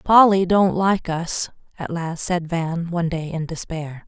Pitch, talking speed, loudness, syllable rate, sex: 170 Hz, 175 wpm, -21 LUFS, 4.1 syllables/s, female